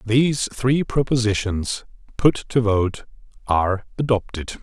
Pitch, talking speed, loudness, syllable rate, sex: 115 Hz, 105 wpm, -21 LUFS, 4.1 syllables/s, male